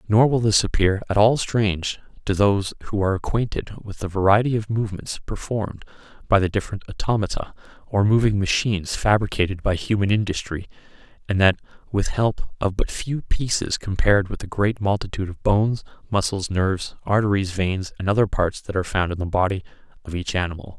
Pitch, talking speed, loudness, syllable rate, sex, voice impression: 100 Hz, 175 wpm, -22 LUFS, 5.8 syllables/s, male, very masculine, very adult-like, middle-aged, very thick, tensed, powerful, bright, soft, slightly muffled, fluent, slightly raspy, very cool, very intellectual, slightly refreshing, very calm, very mature, friendly, reassuring, elegant, slightly sweet, kind, slightly modest